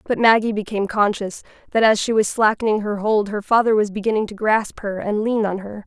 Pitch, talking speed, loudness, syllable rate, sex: 210 Hz, 225 wpm, -19 LUFS, 5.7 syllables/s, female